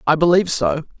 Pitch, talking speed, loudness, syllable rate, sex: 150 Hz, 180 wpm, -17 LUFS, 6.8 syllables/s, male